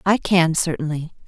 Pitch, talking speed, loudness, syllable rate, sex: 170 Hz, 140 wpm, -20 LUFS, 4.8 syllables/s, female